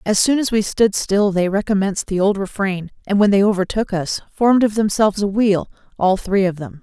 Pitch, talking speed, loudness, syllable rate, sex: 200 Hz, 220 wpm, -18 LUFS, 5.5 syllables/s, female